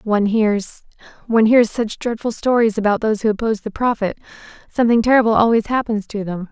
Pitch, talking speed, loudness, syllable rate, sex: 220 Hz, 165 wpm, -17 LUFS, 6.3 syllables/s, female